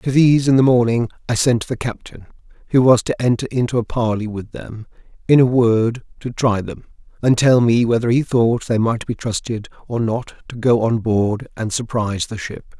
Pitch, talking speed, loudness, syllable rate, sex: 115 Hz, 205 wpm, -18 LUFS, 5.0 syllables/s, male